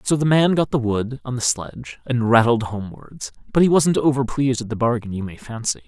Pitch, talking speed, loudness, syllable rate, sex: 125 Hz, 235 wpm, -20 LUFS, 5.7 syllables/s, male